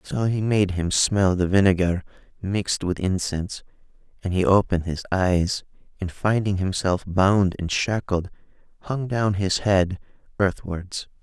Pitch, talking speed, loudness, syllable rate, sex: 95 Hz, 145 wpm, -23 LUFS, 4.3 syllables/s, male